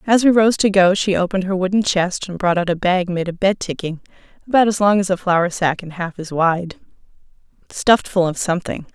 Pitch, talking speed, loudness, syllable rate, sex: 185 Hz, 230 wpm, -18 LUFS, 5.7 syllables/s, female